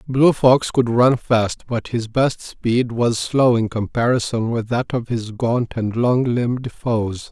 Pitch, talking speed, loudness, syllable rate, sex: 120 Hz, 180 wpm, -19 LUFS, 3.7 syllables/s, male